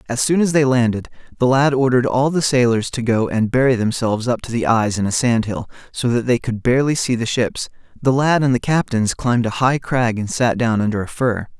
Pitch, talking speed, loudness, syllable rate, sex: 120 Hz, 240 wpm, -18 LUFS, 5.6 syllables/s, male